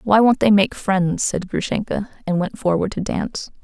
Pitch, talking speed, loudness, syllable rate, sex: 200 Hz, 200 wpm, -20 LUFS, 4.9 syllables/s, female